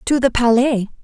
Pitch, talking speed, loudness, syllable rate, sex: 245 Hz, 175 wpm, -16 LUFS, 4.9 syllables/s, female